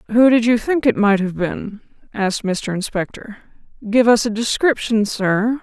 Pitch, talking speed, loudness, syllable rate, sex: 220 Hz, 170 wpm, -18 LUFS, 4.6 syllables/s, female